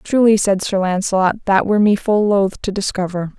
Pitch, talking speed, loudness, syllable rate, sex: 200 Hz, 195 wpm, -16 LUFS, 5.3 syllables/s, female